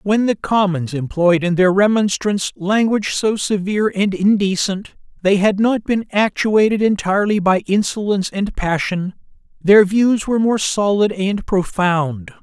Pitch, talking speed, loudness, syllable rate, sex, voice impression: 200 Hz, 140 wpm, -17 LUFS, 4.5 syllables/s, male, very masculine, slightly old, thick, very tensed, powerful, bright, slightly soft, very clear, fluent, slightly raspy, cool, intellectual, slightly refreshing, very sincere, very calm, very mature, friendly, reassuring, very unique, slightly elegant, slightly wild, slightly sweet, lively, slightly kind, slightly intense